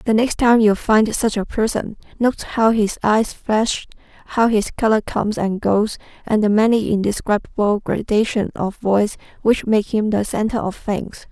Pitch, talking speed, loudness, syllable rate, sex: 215 Hz, 175 wpm, -18 LUFS, 4.6 syllables/s, female